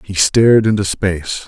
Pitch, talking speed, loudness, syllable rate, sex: 100 Hz, 165 wpm, -14 LUFS, 5.2 syllables/s, male